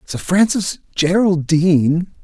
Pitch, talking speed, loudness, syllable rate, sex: 180 Hz, 80 wpm, -16 LUFS, 3.6 syllables/s, male